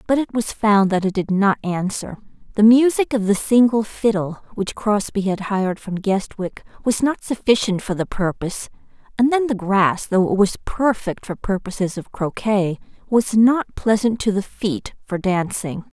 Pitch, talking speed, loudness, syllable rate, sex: 205 Hz, 175 wpm, -20 LUFS, 4.5 syllables/s, female